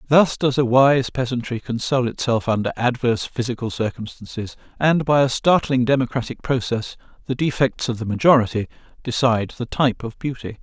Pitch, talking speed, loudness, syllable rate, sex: 125 Hz, 150 wpm, -20 LUFS, 5.6 syllables/s, male